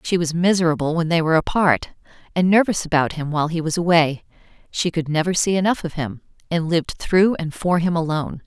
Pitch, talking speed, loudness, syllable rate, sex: 165 Hz, 205 wpm, -20 LUFS, 6.0 syllables/s, female